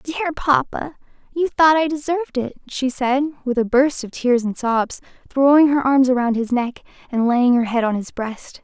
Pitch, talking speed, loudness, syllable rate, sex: 265 Hz, 200 wpm, -19 LUFS, 4.7 syllables/s, female